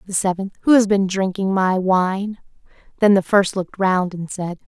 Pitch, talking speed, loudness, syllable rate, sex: 190 Hz, 190 wpm, -19 LUFS, 4.8 syllables/s, female